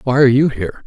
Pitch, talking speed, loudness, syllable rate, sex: 130 Hz, 280 wpm, -14 LUFS, 7.9 syllables/s, male